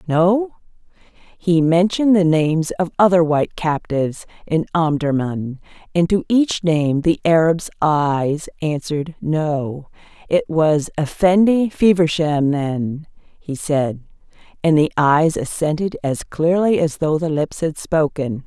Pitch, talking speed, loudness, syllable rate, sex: 160 Hz, 125 wpm, -18 LUFS, 3.8 syllables/s, female